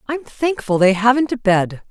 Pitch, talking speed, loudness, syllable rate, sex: 235 Hz, 190 wpm, -17 LUFS, 4.6 syllables/s, female